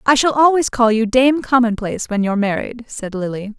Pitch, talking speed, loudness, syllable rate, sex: 235 Hz, 200 wpm, -16 LUFS, 5.3 syllables/s, female